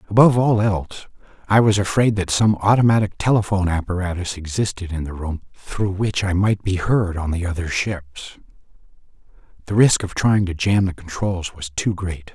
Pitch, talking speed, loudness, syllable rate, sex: 95 Hz, 175 wpm, -20 LUFS, 5.1 syllables/s, male